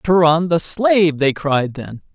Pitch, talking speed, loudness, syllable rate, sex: 160 Hz, 170 wpm, -16 LUFS, 4.0 syllables/s, male